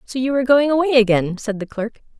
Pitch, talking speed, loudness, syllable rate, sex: 245 Hz, 245 wpm, -18 LUFS, 6.2 syllables/s, female